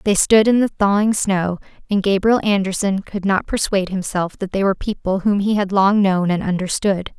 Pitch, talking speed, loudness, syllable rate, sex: 195 Hz, 200 wpm, -18 LUFS, 5.2 syllables/s, female